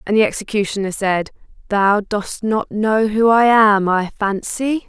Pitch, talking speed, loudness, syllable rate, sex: 210 Hz, 160 wpm, -17 LUFS, 4.2 syllables/s, female